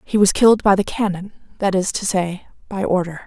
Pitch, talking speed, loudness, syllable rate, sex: 195 Hz, 220 wpm, -18 LUFS, 5.7 syllables/s, female